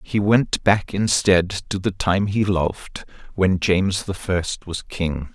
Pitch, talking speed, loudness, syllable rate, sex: 95 Hz, 170 wpm, -21 LUFS, 3.7 syllables/s, male